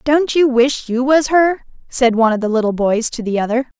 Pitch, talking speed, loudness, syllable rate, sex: 250 Hz, 235 wpm, -15 LUFS, 5.4 syllables/s, female